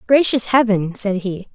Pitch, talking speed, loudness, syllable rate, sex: 215 Hz, 155 wpm, -18 LUFS, 4.3 syllables/s, female